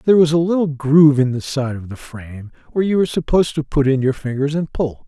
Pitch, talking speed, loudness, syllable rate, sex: 145 Hz, 260 wpm, -17 LUFS, 6.6 syllables/s, male